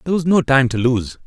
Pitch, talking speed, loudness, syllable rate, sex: 135 Hz, 285 wpm, -16 LUFS, 6.4 syllables/s, male